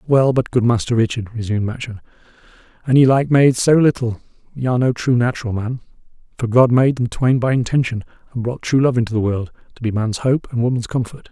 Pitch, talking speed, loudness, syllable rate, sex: 120 Hz, 210 wpm, -18 LUFS, 6.0 syllables/s, male